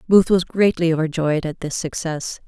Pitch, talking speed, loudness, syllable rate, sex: 165 Hz, 170 wpm, -20 LUFS, 4.8 syllables/s, female